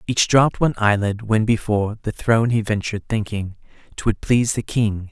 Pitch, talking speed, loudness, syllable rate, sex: 110 Hz, 175 wpm, -20 LUFS, 5.6 syllables/s, male